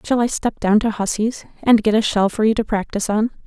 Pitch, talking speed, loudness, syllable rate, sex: 215 Hz, 260 wpm, -18 LUFS, 5.8 syllables/s, female